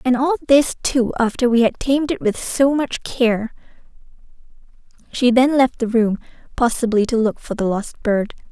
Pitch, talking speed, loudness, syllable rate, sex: 240 Hz, 175 wpm, -18 LUFS, 4.7 syllables/s, female